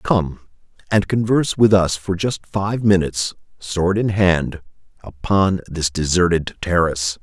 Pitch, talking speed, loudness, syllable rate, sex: 90 Hz, 135 wpm, -18 LUFS, 4.2 syllables/s, male